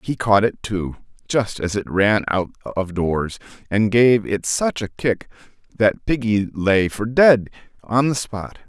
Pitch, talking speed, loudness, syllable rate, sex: 105 Hz, 175 wpm, -19 LUFS, 3.9 syllables/s, male